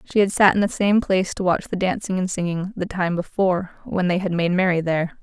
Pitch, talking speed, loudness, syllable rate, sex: 185 Hz, 255 wpm, -21 LUFS, 6.1 syllables/s, female